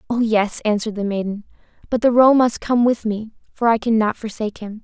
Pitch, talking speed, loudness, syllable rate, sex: 220 Hz, 210 wpm, -19 LUFS, 5.8 syllables/s, female